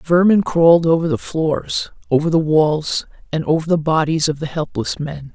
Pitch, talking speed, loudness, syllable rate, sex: 160 Hz, 180 wpm, -17 LUFS, 4.7 syllables/s, female